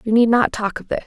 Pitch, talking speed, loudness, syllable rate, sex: 225 Hz, 335 wpm, -18 LUFS, 6.2 syllables/s, female